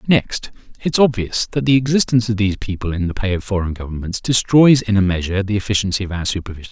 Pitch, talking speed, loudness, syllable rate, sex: 105 Hz, 215 wpm, -18 LUFS, 6.7 syllables/s, male